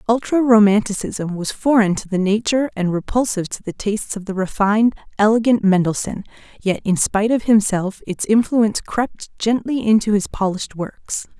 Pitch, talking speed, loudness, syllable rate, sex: 210 Hz, 160 wpm, -18 LUFS, 5.3 syllables/s, female